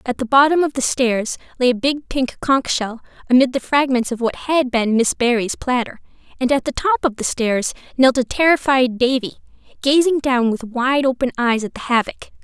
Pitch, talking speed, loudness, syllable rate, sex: 255 Hz, 205 wpm, -18 LUFS, 5.1 syllables/s, female